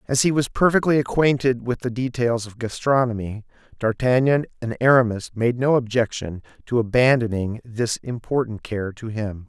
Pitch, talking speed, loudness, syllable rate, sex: 120 Hz, 145 wpm, -21 LUFS, 5.0 syllables/s, male